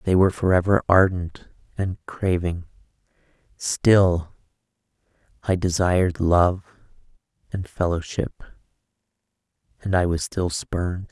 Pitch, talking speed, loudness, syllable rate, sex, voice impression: 90 Hz, 90 wpm, -22 LUFS, 4.1 syllables/s, male, very masculine, middle-aged, very thick, relaxed, weak, dark, soft, slightly clear, fluent, slightly raspy, cool, intellectual, slightly sincere, very calm, mature, friendly, slightly reassuring, slightly unique, slightly elegant, slightly wild, sweet, lively, very kind, very modest